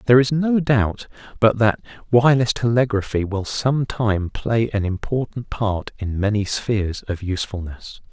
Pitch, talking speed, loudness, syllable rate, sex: 110 Hz, 150 wpm, -20 LUFS, 4.6 syllables/s, male